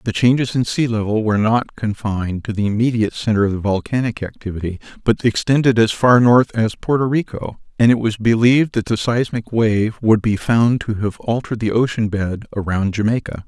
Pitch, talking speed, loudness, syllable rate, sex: 110 Hz, 185 wpm, -18 LUFS, 5.3 syllables/s, male